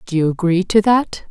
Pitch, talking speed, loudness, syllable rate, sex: 190 Hz, 230 wpm, -16 LUFS, 5.2 syllables/s, female